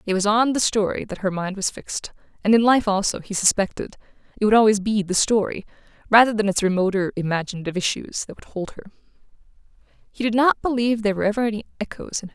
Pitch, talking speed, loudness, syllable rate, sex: 210 Hz, 215 wpm, -21 LUFS, 7.0 syllables/s, female